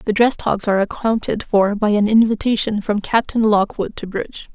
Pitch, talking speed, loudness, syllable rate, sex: 210 Hz, 185 wpm, -18 LUFS, 5.2 syllables/s, female